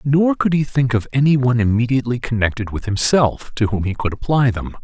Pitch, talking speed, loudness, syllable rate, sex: 125 Hz, 210 wpm, -18 LUFS, 5.9 syllables/s, male